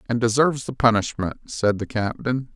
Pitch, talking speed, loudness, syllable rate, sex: 115 Hz, 165 wpm, -22 LUFS, 5.3 syllables/s, male